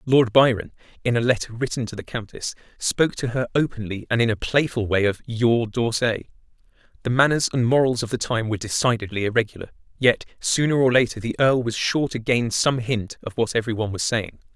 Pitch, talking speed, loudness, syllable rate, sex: 120 Hz, 200 wpm, -22 LUFS, 5.8 syllables/s, male